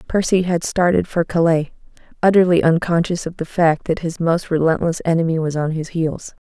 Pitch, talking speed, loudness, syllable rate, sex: 170 Hz, 175 wpm, -18 LUFS, 5.3 syllables/s, female